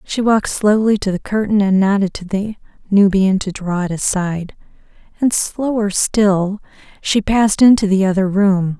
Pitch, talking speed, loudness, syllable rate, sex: 200 Hz, 165 wpm, -16 LUFS, 4.8 syllables/s, female